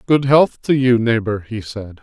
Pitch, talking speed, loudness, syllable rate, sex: 120 Hz, 205 wpm, -16 LUFS, 4.2 syllables/s, male